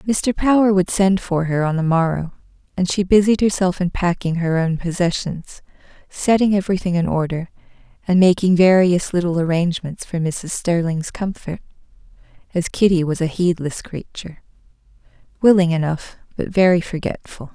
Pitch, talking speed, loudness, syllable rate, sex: 180 Hz, 145 wpm, -18 LUFS, 5.1 syllables/s, female